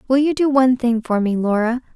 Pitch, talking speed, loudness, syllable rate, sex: 245 Hz, 245 wpm, -18 LUFS, 6.1 syllables/s, female